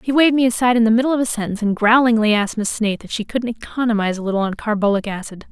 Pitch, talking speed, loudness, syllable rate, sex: 225 Hz, 260 wpm, -18 LUFS, 7.6 syllables/s, female